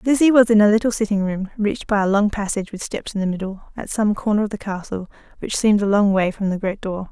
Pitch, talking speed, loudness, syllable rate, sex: 205 Hz, 270 wpm, -20 LUFS, 6.5 syllables/s, female